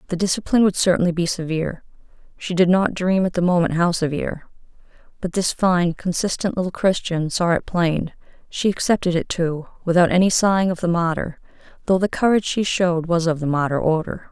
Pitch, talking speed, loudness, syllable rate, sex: 175 Hz, 175 wpm, -20 LUFS, 5.8 syllables/s, female